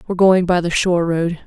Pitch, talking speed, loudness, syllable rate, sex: 175 Hz, 245 wpm, -16 LUFS, 6.4 syllables/s, female